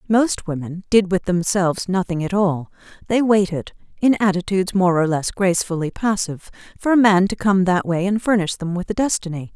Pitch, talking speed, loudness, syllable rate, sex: 190 Hz, 190 wpm, -19 LUFS, 5.5 syllables/s, female